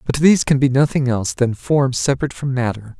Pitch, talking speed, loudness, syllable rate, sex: 130 Hz, 220 wpm, -17 LUFS, 6.2 syllables/s, male